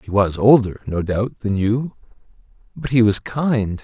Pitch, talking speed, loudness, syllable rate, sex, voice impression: 110 Hz, 170 wpm, -18 LUFS, 4.0 syllables/s, male, masculine, adult-like, tensed, slightly weak, dark, soft, slightly halting, calm, slightly mature, friendly, reassuring, wild, lively, modest